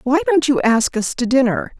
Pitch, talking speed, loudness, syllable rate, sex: 265 Hz, 235 wpm, -17 LUFS, 4.9 syllables/s, female